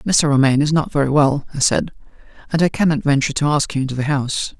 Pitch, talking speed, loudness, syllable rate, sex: 140 Hz, 235 wpm, -17 LUFS, 6.7 syllables/s, male